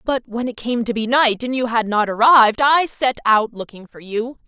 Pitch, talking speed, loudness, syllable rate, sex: 235 Hz, 240 wpm, -17 LUFS, 4.9 syllables/s, female